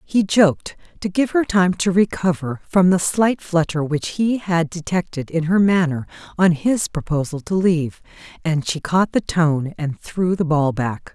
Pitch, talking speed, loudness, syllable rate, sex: 170 Hz, 185 wpm, -19 LUFS, 4.4 syllables/s, female